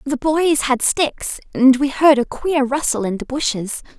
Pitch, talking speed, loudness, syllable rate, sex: 270 Hz, 195 wpm, -17 LUFS, 4.2 syllables/s, female